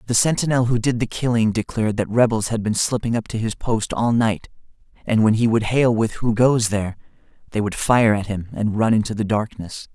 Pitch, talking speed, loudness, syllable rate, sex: 110 Hz, 225 wpm, -20 LUFS, 5.5 syllables/s, male